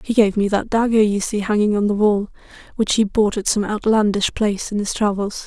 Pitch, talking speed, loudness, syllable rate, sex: 210 Hz, 230 wpm, -18 LUFS, 5.5 syllables/s, female